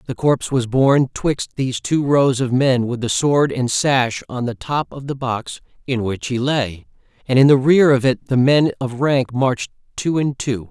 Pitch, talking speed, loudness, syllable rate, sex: 130 Hz, 220 wpm, -18 LUFS, 4.5 syllables/s, male